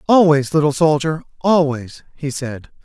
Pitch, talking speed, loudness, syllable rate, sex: 150 Hz, 125 wpm, -17 LUFS, 4.4 syllables/s, male